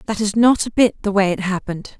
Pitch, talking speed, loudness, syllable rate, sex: 205 Hz, 270 wpm, -17 LUFS, 6.0 syllables/s, female